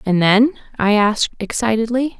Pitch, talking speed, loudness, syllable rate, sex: 220 Hz, 135 wpm, -17 LUFS, 5.2 syllables/s, female